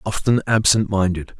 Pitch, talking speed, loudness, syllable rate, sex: 100 Hz, 130 wpm, -18 LUFS, 4.9 syllables/s, male